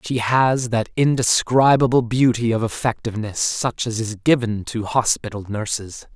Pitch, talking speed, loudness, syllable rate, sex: 115 Hz, 135 wpm, -19 LUFS, 4.6 syllables/s, male